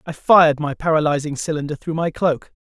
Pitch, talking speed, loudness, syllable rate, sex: 155 Hz, 180 wpm, -18 LUFS, 5.8 syllables/s, male